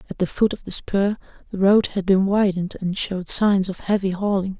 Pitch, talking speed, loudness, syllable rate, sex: 195 Hz, 220 wpm, -21 LUFS, 5.5 syllables/s, female